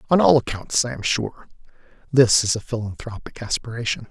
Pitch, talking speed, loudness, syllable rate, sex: 120 Hz, 160 wpm, -21 LUFS, 3.1 syllables/s, male